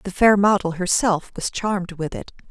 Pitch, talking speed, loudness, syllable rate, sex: 190 Hz, 190 wpm, -20 LUFS, 5.0 syllables/s, female